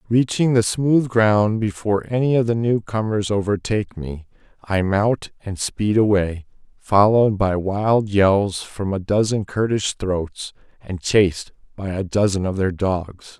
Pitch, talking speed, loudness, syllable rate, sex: 105 Hz, 150 wpm, -20 LUFS, 4.1 syllables/s, male